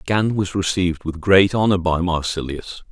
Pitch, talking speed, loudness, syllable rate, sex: 90 Hz, 165 wpm, -19 LUFS, 4.7 syllables/s, male